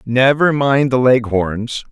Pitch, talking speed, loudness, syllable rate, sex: 125 Hz, 125 wpm, -15 LUFS, 3.4 syllables/s, male